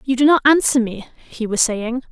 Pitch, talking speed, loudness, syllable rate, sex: 250 Hz, 225 wpm, -16 LUFS, 5.2 syllables/s, female